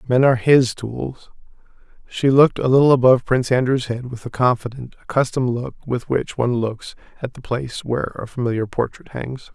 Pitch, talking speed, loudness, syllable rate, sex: 125 Hz, 180 wpm, -19 LUFS, 5.8 syllables/s, male